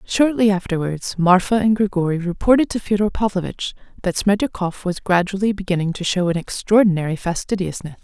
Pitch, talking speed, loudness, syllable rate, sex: 190 Hz, 140 wpm, -19 LUFS, 5.7 syllables/s, female